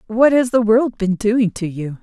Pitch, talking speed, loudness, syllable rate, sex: 220 Hz, 235 wpm, -17 LUFS, 4.4 syllables/s, female